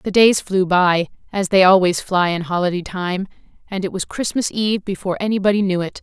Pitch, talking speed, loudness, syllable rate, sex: 190 Hz, 200 wpm, -18 LUFS, 5.7 syllables/s, female